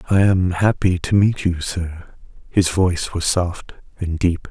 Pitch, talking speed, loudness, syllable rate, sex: 90 Hz, 175 wpm, -19 LUFS, 4.0 syllables/s, male